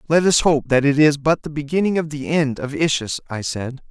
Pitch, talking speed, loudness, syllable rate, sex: 145 Hz, 245 wpm, -19 LUFS, 5.4 syllables/s, male